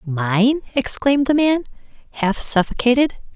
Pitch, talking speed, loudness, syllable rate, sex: 245 Hz, 105 wpm, -18 LUFS, 4.4 syllables/s, female